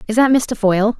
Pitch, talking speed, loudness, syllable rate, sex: 225 Hz, 240 wpm, -15 LUFS, 6.0 syllables/s, female